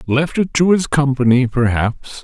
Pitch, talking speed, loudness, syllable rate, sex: 135 Hz, 160 wpm, -16 LUFS, 4.3 syllables/s, male